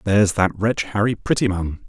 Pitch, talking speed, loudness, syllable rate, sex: 100 Hz, 160 wpm, -20 LUFS, 5.5 syllables/s, male